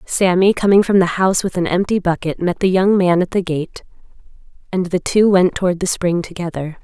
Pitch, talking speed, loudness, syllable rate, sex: 180 Hz, 210 wpm, -16 LUFS, 5.5 syllables/s, female